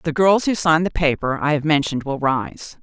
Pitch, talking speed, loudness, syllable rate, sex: 155 Hz, 235 wpm, -19 LUFS, 5.5 syllables/s, female